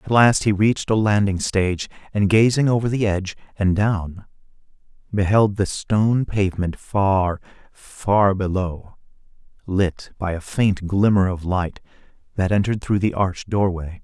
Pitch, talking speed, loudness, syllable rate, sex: 100 Hz, 145 wpm, -20 LUFS, 4.5 syllables/s, male